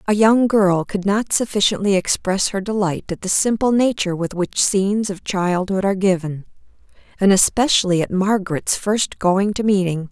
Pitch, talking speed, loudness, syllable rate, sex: 195 Hz, 165 wpm, -18 LUFS, 5.0 syllables/s, female